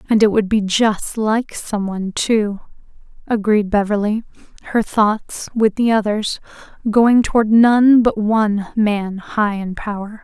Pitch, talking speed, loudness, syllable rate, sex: 215 Hz, 140 wpm, -17 LUFS, 4.0 syllables/s, female